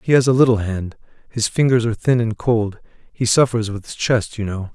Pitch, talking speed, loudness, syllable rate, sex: 115 Hz, 215 wpm, -18 LUFS, 5.5 syllables/s, male